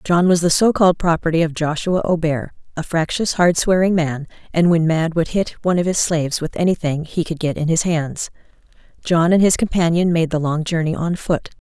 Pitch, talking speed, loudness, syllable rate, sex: 165 Hz, 205 wpm, -18 LUFS, 5.5 syllables/s, female